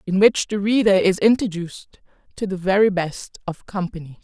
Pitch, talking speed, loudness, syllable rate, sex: 190 Hz, 170 wpm, -20 LUFS, 5.4 syllables/s, female